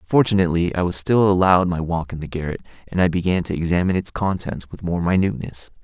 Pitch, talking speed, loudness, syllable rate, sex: 90 Hz, 205 wpm, -20 LUFS, 6.5 syllables/s, male